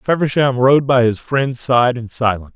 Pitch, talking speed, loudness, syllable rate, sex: 125 Hz, 190 wpm, -15 LUFS, 4.9 syllables/s, male